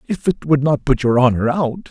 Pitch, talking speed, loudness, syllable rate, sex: 140 Hz, 250 wpm, -17 LUFS, 5.0 syllables/s, male